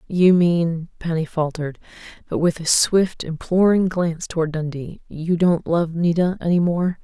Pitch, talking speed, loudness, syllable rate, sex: 170 Hz, 155 wpm, -20 LUFS, 4.6 syllables/s, female